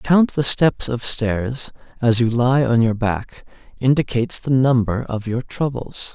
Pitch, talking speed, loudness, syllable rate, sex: 125 Hz, 175 wpm, -18 LUFS, 4.2 syllables/s, male